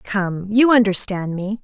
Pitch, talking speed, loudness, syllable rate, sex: 205 Hz, 145 wpm, -18 LUFS, 3.8 syllables/s, female